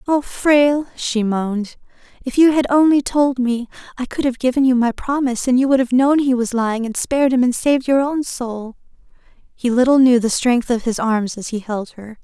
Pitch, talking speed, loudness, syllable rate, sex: 250 Hz, 220 wpm, -17 LUFS, 5.2 syllables/s, female